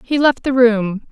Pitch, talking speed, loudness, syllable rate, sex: 240 Hz, 215 wpm, -15 LUFS, 4.1 syllables/s, female